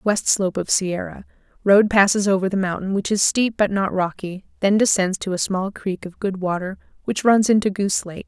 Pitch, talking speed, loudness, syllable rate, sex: 195 Hz, 205 wpm, -20 LUFS, 5.2 syllables/s, female